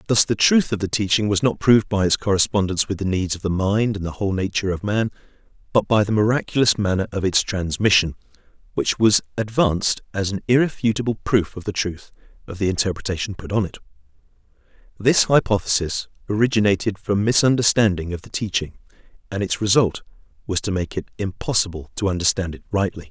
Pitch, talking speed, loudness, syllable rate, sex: 100 Hz, 175 wpm, -20 LUFS, 6.0 syllables/s, male